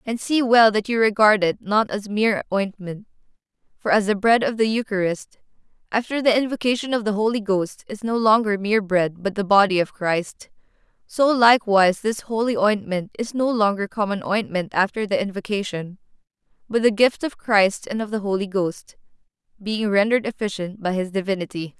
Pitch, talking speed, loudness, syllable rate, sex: 210 Hz, 175 wpm, -21 LUFS, 5.3 syllables/s, female